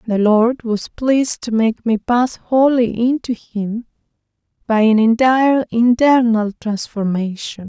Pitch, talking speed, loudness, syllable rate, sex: 230 Hz, 125 wpm, -16 LUFS, 3.9 syllables/s, female